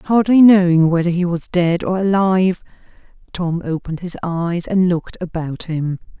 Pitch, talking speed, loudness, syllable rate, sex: 175 Hz, 155 wpm, -17 LUFS, 4.8 syllables/s, female